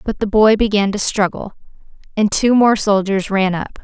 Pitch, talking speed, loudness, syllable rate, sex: 205 Hz, 190 wpm, -15 LUFS, 4.8 syllables/s, female